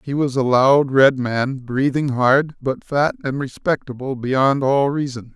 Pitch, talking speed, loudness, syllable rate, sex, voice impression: 135 Hz, 170 wpm, -18 LUFS, 3.9 syllables/s, male, masculine, very adult-like, slightly thick, cool, intellectual, slightly calm, elegant